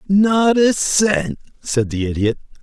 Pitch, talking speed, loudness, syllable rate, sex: 170 Hz, 135 wpm, -17 LUFS, 3.5 syllables/s, male